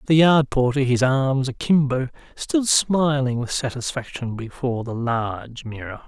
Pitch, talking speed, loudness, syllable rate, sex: 130 Hz, 140 wpm, -21 LUFS, 4.5 syllables/s, male